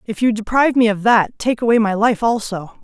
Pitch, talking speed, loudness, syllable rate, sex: 220 Hz, 235 wpm, -16 LUFS, 5.5 syllables/s, female